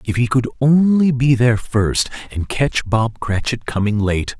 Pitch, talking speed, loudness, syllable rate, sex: 120 Hz, 180 wpm, -17 LUFS, 4.4 syllables/s, male